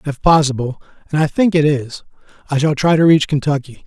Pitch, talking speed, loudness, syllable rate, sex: 150 Hz, 200 wpm, -16 LUFS, 5.1 syllables/s, male